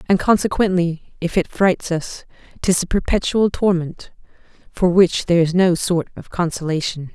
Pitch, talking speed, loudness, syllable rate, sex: 175 Hz, 150 wpm, -18 LUFS, 4.8 syllables/s, female